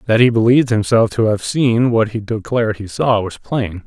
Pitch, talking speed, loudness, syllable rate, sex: 110 Hz, 215 wpm, -16 LUFS, 5.1 syllables/s, male